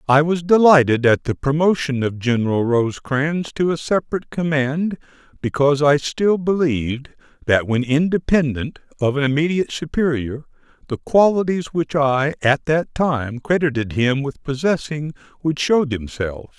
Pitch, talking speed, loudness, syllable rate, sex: 145 Hz, 135 wpm, -19 LUFS, 4.8 syllables/s, male